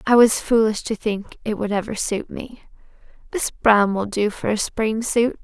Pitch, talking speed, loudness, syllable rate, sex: 215 Hz, 200 wpm, -21 LUFS, 4.4 syllables/s, female